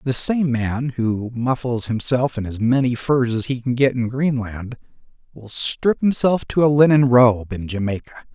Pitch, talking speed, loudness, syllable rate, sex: 125 Hz, 180 wpm, -19 LUFS, 4.4 syllables/s, male